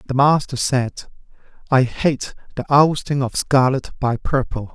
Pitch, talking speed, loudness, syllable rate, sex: 135 Hz, 140 wpm, -19 LUFS, 4.1 syllables/s, male